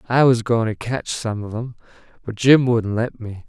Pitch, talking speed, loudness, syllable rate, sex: 115 Hz, 225 wpm, -19 LUFS, 4.6 syllables/s, male